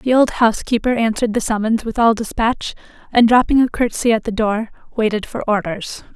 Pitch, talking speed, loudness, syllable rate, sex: 225 Hz, 185 wpm, -17 LUFS, 5.6 syllables/s, female